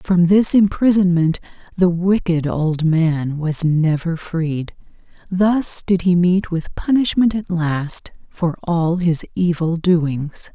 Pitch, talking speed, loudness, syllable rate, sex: 170 Hz, 130 wpm, -18 LUFS, 3.4 syllables/s, female